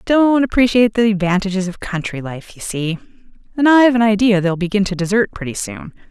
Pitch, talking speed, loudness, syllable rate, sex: 205 Hz, 185 wpm, -16 LUFS, 5.9 syllables/s, female